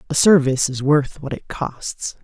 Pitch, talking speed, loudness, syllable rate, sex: 145 Hz, 190 wpm, -19 LUFS, 4.5 syllables/s, male